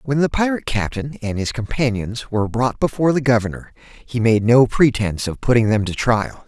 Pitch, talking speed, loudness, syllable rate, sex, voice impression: 120 Hz, 195 wpm, -19 LUFS, 5.5 syllables/s, male, very masculine, slightly adult-like, slightly thick, slightly tensed, slightly powerful, bright, soft, clear, fluent, cool, intellectual, very refreshing, sincere, calm, slightly mature, very friendly, very reassuring, slightly unique, slightly elegant, wild, sweet, lively, very kind, slightly modest